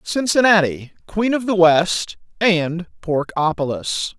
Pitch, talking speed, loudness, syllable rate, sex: 180 Hz, 100 wpm, -18 LUFS, 3.7 syllables/s, male